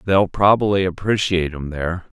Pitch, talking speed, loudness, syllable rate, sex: 90 Hz, 135 wpm, -19 LUFS, 5.6 syllables/s, male